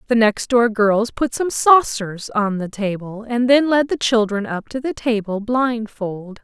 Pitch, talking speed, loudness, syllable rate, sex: 225 Hz, 185 wpm, -18 LUFS, 4.1 syllables/s, female